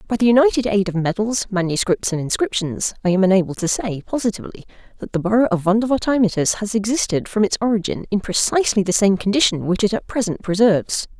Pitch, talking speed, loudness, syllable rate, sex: 210 Hz, 190 wpm, -19 LUFS, 6.4 syllables/s, female